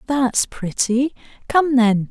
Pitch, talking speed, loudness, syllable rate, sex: 250 Hz, 115 wpm, -19 LUFS, 3.2 syllables/s, female